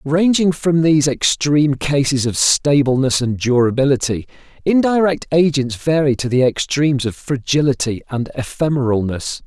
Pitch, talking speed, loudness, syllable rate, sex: 140 Hz, 120 wpm, -16 LUFS, 4.9 syllables/s, male